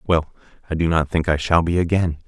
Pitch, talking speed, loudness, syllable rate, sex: 85 Hz, 240 wpm, -20 LUFS, 5.7 syllables/s, male